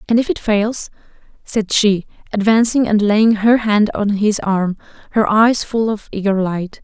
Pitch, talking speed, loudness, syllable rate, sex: 210 Hz, 175 wpm, -16 LUFS, 4.2 syllables/s, female